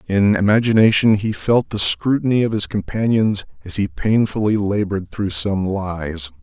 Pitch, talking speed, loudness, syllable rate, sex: 100 Hz, 150 wpm, -18 LUFS, 4.6 syllables/s, male